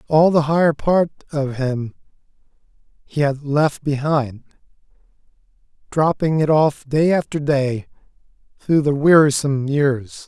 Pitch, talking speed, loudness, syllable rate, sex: 145 Hz, 115 wpm, -18 LUFS, 4.1 syllables/s, male